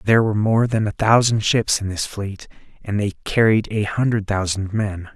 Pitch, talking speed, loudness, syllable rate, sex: 105 Hz, 200 wpm, -19 LUFS, 5.0 syllables/s, male